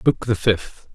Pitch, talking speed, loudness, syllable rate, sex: 105 Hz, 190 wpm, -21 LUFS, 3.4 syllables/s, male